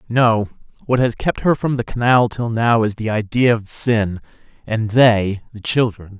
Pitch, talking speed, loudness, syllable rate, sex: 115 Hz, 185 wpm, -17 LUFS, 4.4 syllables/s, male